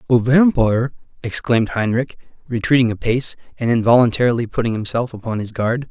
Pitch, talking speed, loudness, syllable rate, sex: 120 Hz, 140 wpm, -18 LUFS, 5.9 syllables/s, male